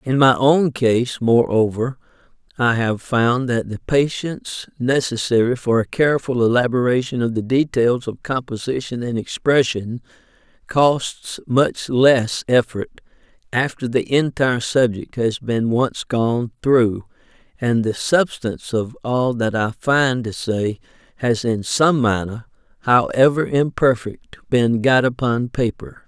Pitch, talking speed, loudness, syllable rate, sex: 125 Hz, 130 wpm, -19 LUFS, 4.0 syllables/s, male